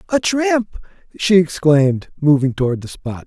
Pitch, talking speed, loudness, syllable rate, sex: 165 Hz, 145 wpm, -16 LUFS, 4.6 syllables/s, male